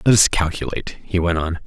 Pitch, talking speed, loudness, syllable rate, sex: 90 Hz, 215 wpm, -20 LUFS, 6.2 syllables/s, male